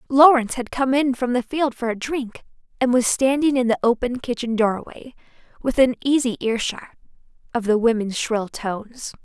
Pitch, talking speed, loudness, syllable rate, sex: 245 Hz, 170 wpm, -21 LUFS, 5.1 syllables/s, female